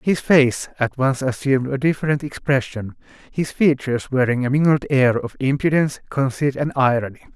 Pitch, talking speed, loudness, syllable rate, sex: 135 Hz, 155 wpm, -19 LUFS, 5.4 syllables/s, male